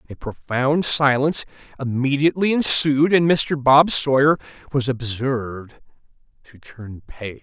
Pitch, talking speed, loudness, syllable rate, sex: 135 Hz, 115 wpm, -18 LUFS, 4.3 syllables/s, male